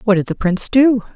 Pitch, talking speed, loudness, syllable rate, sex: 220 Hz, 260 wpm, -15 LUFS, 6.3 syllables/s, female